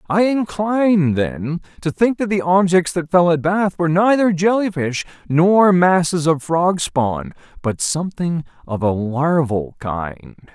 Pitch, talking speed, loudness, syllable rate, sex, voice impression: 165 Hz, 150 wpm, -18 LUFS, 4.0 syllables/s, male, very masculine, very adult-like, middle-aged, thick, very tensed, very powerful, very bright, slightly soft, very clear, very fluent, very cool, intellectual, refreshing, very sincere, very calm, mature, very friendly, very reassuring, very unique, slightly elegant, very wild, sweet, very lively, slightly kind, intense